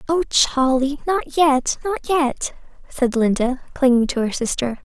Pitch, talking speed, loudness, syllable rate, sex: 275 Hz, 145 wpm, -19 LUFS, 4.0 syllables/s, female